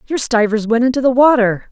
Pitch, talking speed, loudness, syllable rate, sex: 240 Hz, 210 wpm, -14 LUFS, 5.8 syllables/s, female